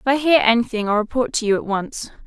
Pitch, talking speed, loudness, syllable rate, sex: 230 Hz, 265 wpm, -19 LUFS, 6.2 syllables/s, female